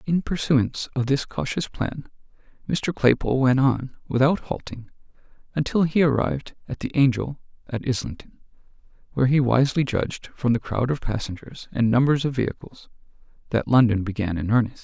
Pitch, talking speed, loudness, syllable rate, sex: 125 Hz, 155 wpm, -23 LUFS, 5.5 syllables/s, male